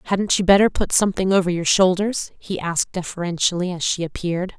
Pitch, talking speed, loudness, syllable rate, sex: 180 Hz, 185 wpm, -20 LUFS, 6.0 syllables/s, female